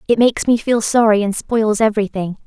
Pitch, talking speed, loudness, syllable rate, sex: 215 Hz, 195 wpm, -16 LUFS, 5.8 syllables/s, female